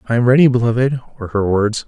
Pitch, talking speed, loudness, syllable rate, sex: 120 Hz, 190 wpm, -15 LUFS, 6.6 syllables/s, male